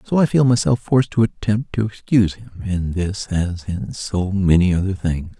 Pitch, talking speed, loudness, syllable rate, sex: 100 Hz, 200 wpm, -19 LUFS, 4.9 syllables/s, male